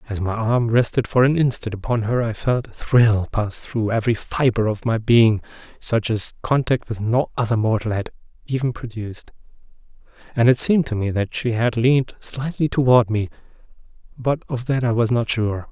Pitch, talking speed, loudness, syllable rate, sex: 115 Hz, 185 wpm, -20 LUFS, 5.1 syllables/s, male